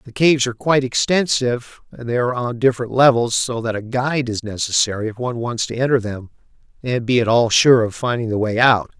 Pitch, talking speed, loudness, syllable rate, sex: 120 Hz, 220 wpm, -18 LUFS, 6.2 syllables/s, male